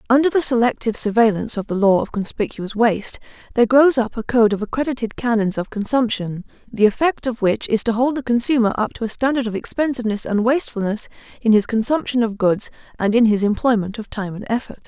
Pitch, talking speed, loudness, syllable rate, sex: 225 Hz, 200 wpm, -19 LUFS, 6.2 syllables/s, female